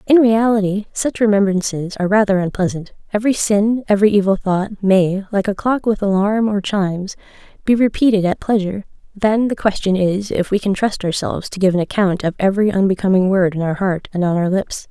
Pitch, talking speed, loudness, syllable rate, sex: 200 Hz, 195 wpm, -17 LUFS, 5.7 syllables/s, female